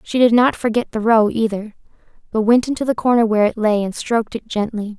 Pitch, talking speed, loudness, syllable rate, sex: 225 Hz, 230 wpm, -17 LUFS, 6.0 syllables/s, female